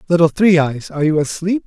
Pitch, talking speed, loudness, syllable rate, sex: 165 Hz, 215 wpm, -16 LUFS, 6.1 syllables/s, male